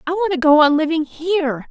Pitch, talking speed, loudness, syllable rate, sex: 315 Hz, 245 wpm, -16 LUFS, 5.9 syllables/s, female